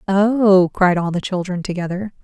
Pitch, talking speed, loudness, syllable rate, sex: 190 Hz, 160 wpm, -17 LUFS, 4.5 syllables/s, female